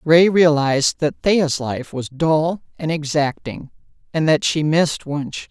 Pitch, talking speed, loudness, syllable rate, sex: 155 Hz, 155 wpm, -18 LUFS, 4.0 syllables/s, female